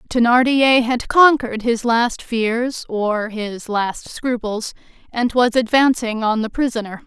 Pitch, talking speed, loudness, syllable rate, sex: 235 Hz, 135 wpm, -18 LUFS, 3.9 syllables/s, female